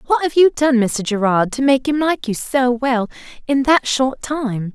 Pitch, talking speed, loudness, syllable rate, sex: 255 Hz, 215 wpm, -17 LUFS, 4.3 syllables/s, female